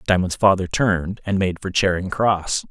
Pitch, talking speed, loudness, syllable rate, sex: 95 Hz, 180 wpm, -20 LUFS, 4.8 syllables/s, male